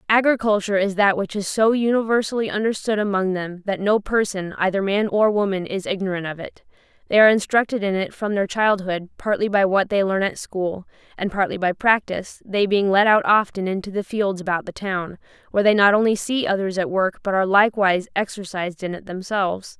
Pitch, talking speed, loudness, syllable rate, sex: 200 Hz, 200 wpm, -20 LUFS, 5.8 syllables/s, female